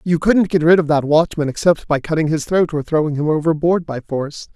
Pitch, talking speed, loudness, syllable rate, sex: 160 Hz, 235 wpm, -17 LUFS, 5.7 syllables/s, male